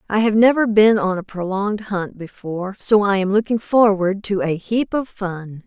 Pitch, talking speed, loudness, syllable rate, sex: 200 Hz, 200 wpm, -18 LUFS, 4.8 syllables/s, female